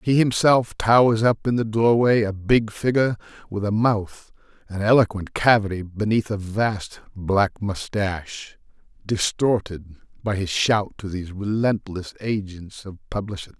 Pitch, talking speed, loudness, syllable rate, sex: 105 Hz, 130 wpm, -21 LUFS, 4.5 syllables/s, male